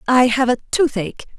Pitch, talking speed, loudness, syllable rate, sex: 250 Hz, 175 wpm, -17 LUFS, 5.9 syllables/s, female